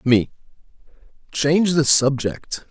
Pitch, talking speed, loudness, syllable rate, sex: 135 Hz, 90 wpm, -18 LUFS, 3.8 syllables/s, male